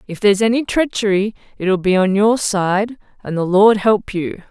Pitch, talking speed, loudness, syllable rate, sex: 200 Hz, 185 wpm, -16 LUFS, 4.7 syllables/s, female